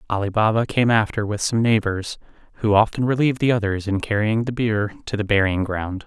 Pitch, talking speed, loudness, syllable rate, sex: 105 Hz, 200 wpm, -21 LUFS, 5.6 syllables/s, male